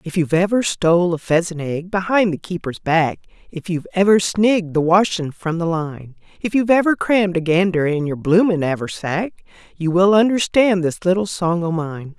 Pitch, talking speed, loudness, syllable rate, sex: 180 Hz, 185 wpm, -18 LUFS, 5.3 syllables/s, female